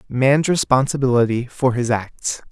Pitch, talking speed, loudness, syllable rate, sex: 130 Hz, 120 wpm, -18 LUFS, 4.4 syllables/s, male